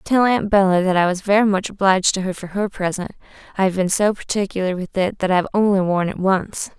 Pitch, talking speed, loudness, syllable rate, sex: 190 Hz, 250 wpm, -19 LUFS, 6.0 syllables/s, female